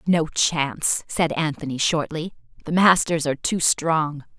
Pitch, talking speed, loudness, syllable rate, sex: 160 Hz, 135 wpm, -21 LUFS, 4.2 syllables/s, female